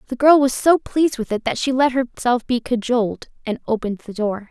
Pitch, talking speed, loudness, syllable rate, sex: 245 Hz, 225 wpm, -19 LUFS, 5.6 syllables/s, female